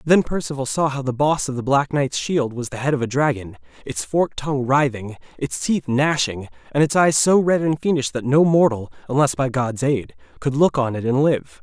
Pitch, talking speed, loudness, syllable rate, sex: 140 Hz, 225 wpm, -20 LUFS, 5.2 syllables/s, male